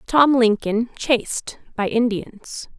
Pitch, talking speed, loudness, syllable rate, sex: 230 Hz, 110 wpm, -20 LUFS, 3.4 syllables/s, female